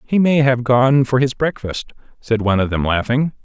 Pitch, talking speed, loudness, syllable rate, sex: 125 Hz, 210 wpm, -17 LUFS, 5.0 syllables/s, male